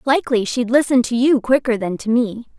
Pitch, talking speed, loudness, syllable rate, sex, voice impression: 240 Hz, 210 wpm, -17 LUFS, 5.4 syllables/s, female, slightly gender-neutral, young, fluent, slightly cute, slightly refreshing, friendly